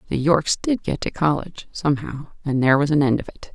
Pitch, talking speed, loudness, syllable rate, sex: 150 Hz, 235 wpm, -21 LUFS, 6.3 syllables/s, female